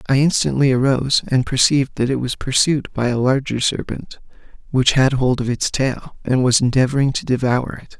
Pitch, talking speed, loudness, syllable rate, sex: 130 Hz, 190 wpm, -18 LUFS, 5.4 syllables/s, male